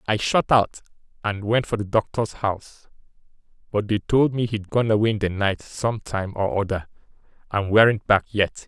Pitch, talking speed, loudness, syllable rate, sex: 105 Hz, 185 wpm, -22 LUFS, 4.8 syllables/s, male